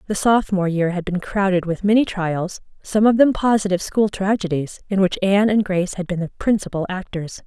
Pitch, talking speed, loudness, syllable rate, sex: 195 Hz, 200 wpm, -20 LUFS, 5.9 syllables/s, female